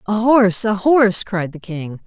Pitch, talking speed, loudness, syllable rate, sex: 205 Hz, 205 wpm, -16 LUFS, 4.8 syllables/s, female